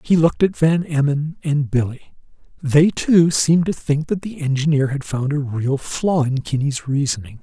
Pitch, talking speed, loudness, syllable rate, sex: 145 Hz, 185 wpm, -19 LUFS, 4.7 syllables/s, male